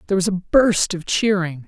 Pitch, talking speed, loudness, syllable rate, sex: 185 Hz, 215 wpm, -19 LUFS, 5.4 syllables/s, female